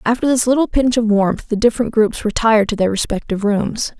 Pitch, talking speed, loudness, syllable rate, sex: 225 Hz, 210 wpm, -16 LUFS, 5.9 syllables/s, female